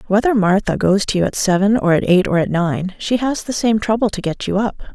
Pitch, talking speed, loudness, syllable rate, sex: 200 Hz, 265 wpm, -17 LUFS, 5.6 syllables/s, female